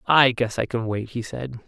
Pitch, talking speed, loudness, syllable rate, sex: 120 Hz, 250 wpm, -23 LUFS, 4.8 syllables/s, female